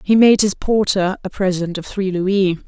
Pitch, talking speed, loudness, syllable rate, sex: 190 Hz, 200 wpm, -17 LUFS, 4.5 syllables/s, female